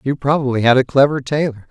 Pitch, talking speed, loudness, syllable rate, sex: 135 Hz, 210 wpm, -16 LUFS, 6.2 syllables/s, male